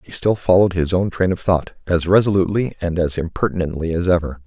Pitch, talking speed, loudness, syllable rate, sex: 90 Hz, 200 wpm, -18 LUFS, 6.2 syllables/s, male